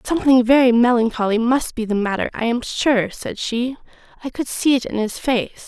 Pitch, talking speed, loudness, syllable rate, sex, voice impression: 240 Hz, 200 wpm, -18 LUFS, 5.1 syllables/s, female, feminine, slightly young, slightly tensed, slightly cute, slightly friendly, slightly lively